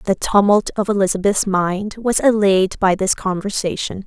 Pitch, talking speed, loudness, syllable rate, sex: 200 Hz, 145 wpm, -17 LUFS, 4.5 syllables/s, female